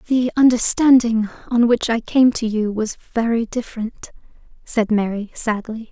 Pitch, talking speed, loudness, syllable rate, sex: 230 Hz, 140 wpm, -18 LUFS, 4.6 syllables/s, female